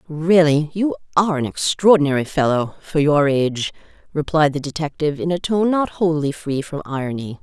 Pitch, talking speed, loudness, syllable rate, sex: 155 Hz, 145 wpm, -19 LUFS, 5.4 syllables/s, female